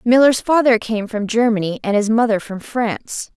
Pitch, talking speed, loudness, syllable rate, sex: 225 Hz, 175 wpm, -17 LUFS, 5.0 syllables/s, female